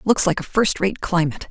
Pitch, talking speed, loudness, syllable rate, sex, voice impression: 185 Hz, 240 wpm, -20 LUFS, 5.8 syllables/s, female, very feminine, very adult-like, slightly middle-aged, thin, slightly relaxed, slightly weak, slightly dark, hard, clear, fluent, slightly raspy, cool, very intellectual, slightly refreshing, sincere, very calm, slightly friendly, slightly reassuring, elegant, slightly sweet, slightly lively, kind, slightly modest